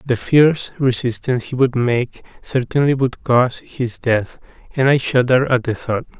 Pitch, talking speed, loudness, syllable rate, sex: 125 Hz, 165 wpm, -17 LUFS, 4.9 syllables/s, male